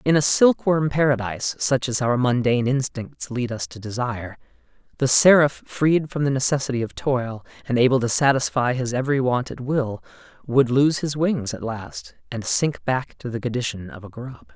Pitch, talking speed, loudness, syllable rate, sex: 125 Hz, 185 wpm, -21 LUFS, 5.0 syllables/s, male